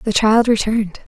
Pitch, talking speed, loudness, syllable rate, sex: 215 Hz, 160 wpm, -16 LUFS, 5.3 syllables/s, female